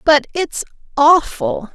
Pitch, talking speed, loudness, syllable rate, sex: 280 Hz, 105 wpm, -16 LUFS, 3.2 syllables/s, female